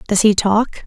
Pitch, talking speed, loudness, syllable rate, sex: 210 Hz, 210 wpm, -15 LUFS, 4.1 syllables/s, female